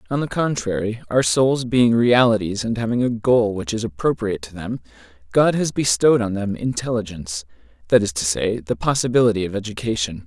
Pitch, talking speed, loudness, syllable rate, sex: 110 Hz, 175 wpm, -20 LUFS, 5.7 syllables/s, male